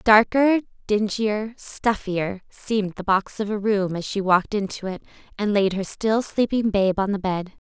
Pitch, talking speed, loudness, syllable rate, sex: 205 Hz, 180 wpm, -23 LUFS, 4.5 syllables/s, female